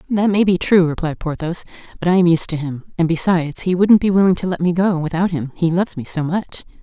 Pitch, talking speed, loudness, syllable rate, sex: 175 Hz, 255 wpm, -17 LUFS, 6.1 syllables/s, female